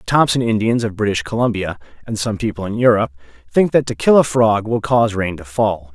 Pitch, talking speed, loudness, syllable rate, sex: 110 Hz, 220 wpm, -17 LUFS, 5.9 syllables/s, male